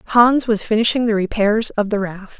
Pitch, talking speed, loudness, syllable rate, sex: 215 Hz, 200 wpm, -17 LUFS, 4.7 syllables/s, female